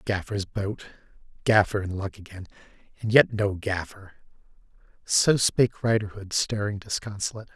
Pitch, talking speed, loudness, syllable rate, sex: 105 Hz, 120 wpm, -25 LUFS, 4.9 syllables/s, male